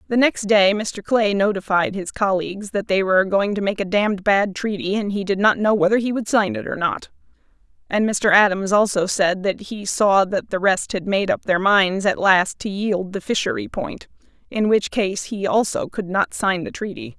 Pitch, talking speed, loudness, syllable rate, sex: 200 Hz, 220 wpm, -20 LUFS, 4.9 syllables/s, female